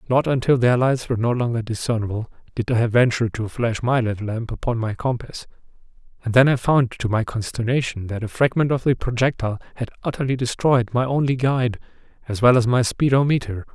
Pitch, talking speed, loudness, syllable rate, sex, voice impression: 120 Hz, 190 wpm, -21 LUFS, 5.9 syllables/s, male, masculine, adult-like, slightly middle-aged, slightly thick, slightly relaxed, slightly weak, slightly bright, slightly soft, slightly muffled, slightly halting, slightly raspy, slightly cool, intellectual, sincere, slightly calm, slightly mature, slightly friendly, slightly reassuring, wild, slightly lively, kind, modest